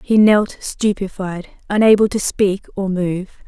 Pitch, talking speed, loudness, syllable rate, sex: 200 Hz, 140 wpm, -17 LUFS, 4.2 syllables/s, female